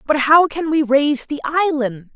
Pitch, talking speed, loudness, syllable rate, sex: 285 Hz, 195 wpm, -17 LUFS, 4.5 syllables/s, female